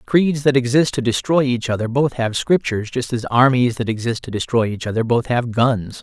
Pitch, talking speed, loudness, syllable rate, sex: 125 Hz, 220 wpm, -18 LUFS, 5.3 syllables/s, male